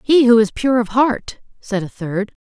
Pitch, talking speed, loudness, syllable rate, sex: 230 Hz, 225 wpm, -17 LUFS, 4.3 syllables/s, female